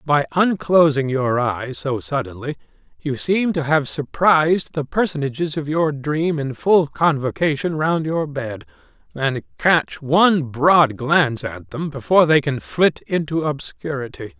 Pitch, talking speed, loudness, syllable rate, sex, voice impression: 150 Hz, 145 wpm, -19 LUFS, 4.2 syllables/s, male, masculine, middle-aged, thick, slightly relaxed, powerful, hard, slightly muffled, raspy, cool, calm, mature, friendly, wild, lively, slightly strict, slightly intense